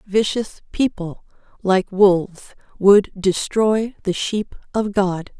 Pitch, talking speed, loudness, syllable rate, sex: 200 Hz, 110 wpm, -19 LUFS, 3.4 syllables/s, female